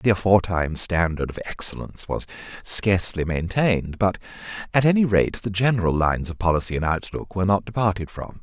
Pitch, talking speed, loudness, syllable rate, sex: 95 Hz, 165 wpm, -22 LUFS, 6.1 syllables/s, male